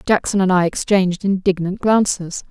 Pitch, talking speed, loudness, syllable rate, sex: 190 Hz, 145 wpm, -17 LUFS, 5.2 syllables/s, female